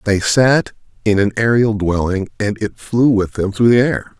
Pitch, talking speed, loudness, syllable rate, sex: 110 Hz, 200 wpm, -16 LUFS, 4.5 syllables/s, male